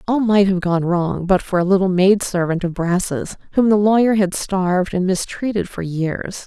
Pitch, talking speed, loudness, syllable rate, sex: 190 Hz, 205 wpm, -18 LUFS, 4.6 syllables/s, female